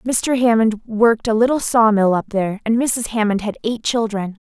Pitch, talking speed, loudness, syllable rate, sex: 220 Hz, 190 wpm, -17 LUFS, 5.0 syllables/s, female